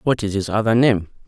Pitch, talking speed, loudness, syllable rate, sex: 105 Hz, 235 wpm, -19 LUFS, 5.8 syllables/s, male